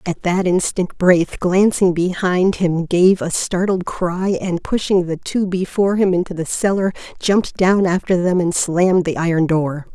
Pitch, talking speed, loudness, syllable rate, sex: 180 Hz, 175 wpm, -17 LUFS, 4.5 syllables/s, female